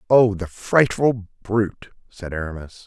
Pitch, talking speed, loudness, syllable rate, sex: 105 Hz, 125 wpm, -21 LUFS, 4.0 syllables/s, male